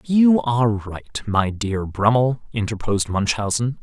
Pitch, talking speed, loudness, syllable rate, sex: 115 Hz, 125 wpm, -20 LUFS, 4.2 syllables/s, male